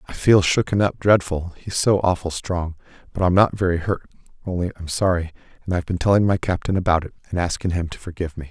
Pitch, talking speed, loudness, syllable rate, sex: 90 Hz, 220 wpm, -21 LUFS, 6.3 syllables/s, male